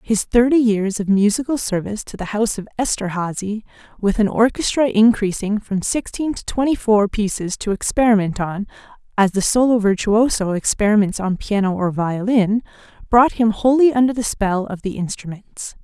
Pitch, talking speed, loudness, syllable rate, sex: 215 Hz, 160 wpm, -18 LUFS, 5.1 syllables/s, female